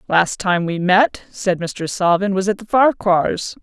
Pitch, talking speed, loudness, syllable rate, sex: 190 Hz, 180 wpm, -17 LUFS, 4.2 syllables/s, female